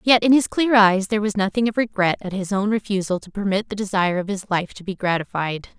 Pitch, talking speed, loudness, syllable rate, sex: 200 Hz, 250 wpm, -21 LUFS, 6.2 syllables/s, female